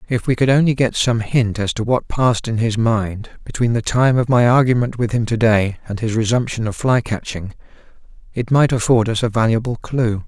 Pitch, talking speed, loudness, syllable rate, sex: 115 Hz, 215 wpm, -17 LUFS, 5.3 syllables/s, male